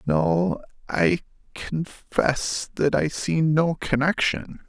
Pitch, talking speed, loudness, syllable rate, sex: 140 Hz, 105 wpm, -24 LUFS, 2.9 syllables/s, male